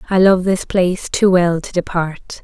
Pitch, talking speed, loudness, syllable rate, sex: 180 Hz, 200 wpm, -16 LUFS, 4.5 syllables/s, female